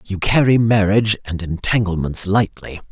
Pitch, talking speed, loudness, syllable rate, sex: 100 Hz, 125 wpm, -17 LUFS, 4.9 syllables/s, male